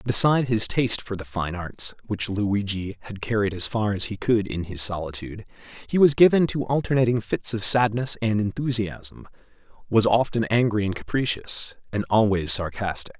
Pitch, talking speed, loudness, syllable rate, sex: 105 Hz, 170 wpm, -23 LUFS, 5.1 syllables/s, male